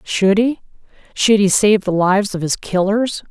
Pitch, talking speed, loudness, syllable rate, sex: 200 Hz, 180 wpm, -16 LUFS, 4.6 syllables/s, female